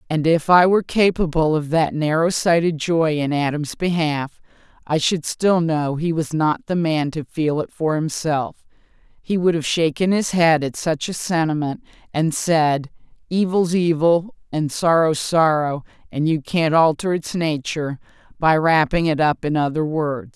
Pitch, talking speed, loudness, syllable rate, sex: 160 Hz, 170 wpm, -19 LUFS, 4.3 syllables/s, female